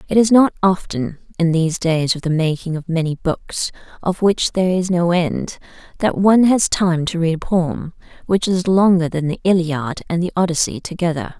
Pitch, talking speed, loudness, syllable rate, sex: 175 Hz, 195 wpm, -18 LUFS, 5.0 syllables/s, female